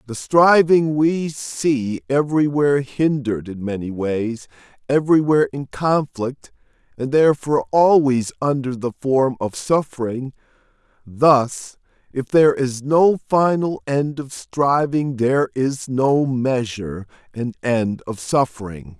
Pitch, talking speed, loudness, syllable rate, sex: 135 Hz, 115 wpm, -19 LUFS, 4.0 syllables/s, male